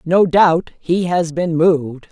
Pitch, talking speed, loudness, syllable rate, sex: 170 Hz, 170 wpm, -16 LUFS, 3.6 syllables/s, female